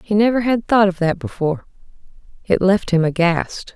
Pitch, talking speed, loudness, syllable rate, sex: 190 Hz, 160 wpm, -18 LUFS, 5.2 syllables/s, female